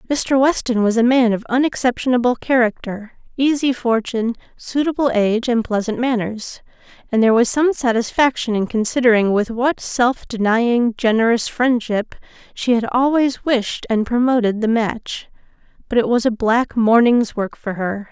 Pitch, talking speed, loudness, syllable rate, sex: 235 Hz, 150 wpm, -17 LUFS, 4.8 syllables/s, female